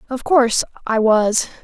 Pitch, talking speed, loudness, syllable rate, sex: 240 Hz, 145 wpm, -17 LUFS, 4.6 syllables/s, female